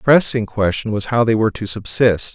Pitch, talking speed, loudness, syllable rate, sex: 110 Hz, 230 wpm, -17 LUFS, 5.6 syllables/s, male